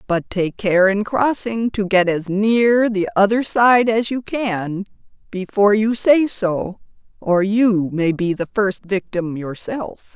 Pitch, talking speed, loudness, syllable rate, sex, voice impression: 205 Hz, 160 wpm, -18 LUFS, 3.7 syllables/s, female, feminine, very adult-like, slightly intellectual, sincere, slightly elegant